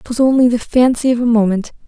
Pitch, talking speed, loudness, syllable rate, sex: 240 Hz, 225 wpm, -14 LUFS, 6.0 syllables/s, female